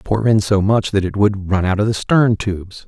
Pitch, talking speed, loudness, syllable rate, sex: 100 Hz, 270 wpm, -16 LUFS, 5.1 syllables/s, male